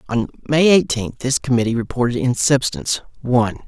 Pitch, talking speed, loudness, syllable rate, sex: 130 Hz, 145 wpm, -18 LUFS, 5.6 syllables/s, male